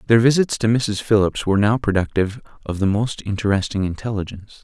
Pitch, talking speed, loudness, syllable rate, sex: 105 Hz, 170 wpm, -20 LUFS, 6.2 syllables/s, male